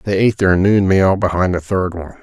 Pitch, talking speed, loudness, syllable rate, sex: 95 Hz, 245 wpm, -15 LUFS, 5.7 syllables/s, male